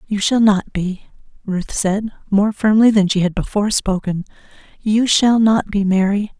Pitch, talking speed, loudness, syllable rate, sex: 205 Hz, 170 wpm, -17 LUFS, 4.5 syllables/s, female